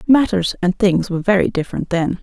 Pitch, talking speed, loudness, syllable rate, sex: 190 Hz, 190 wpm, -17 LUFS, 6.0 syllables/s, female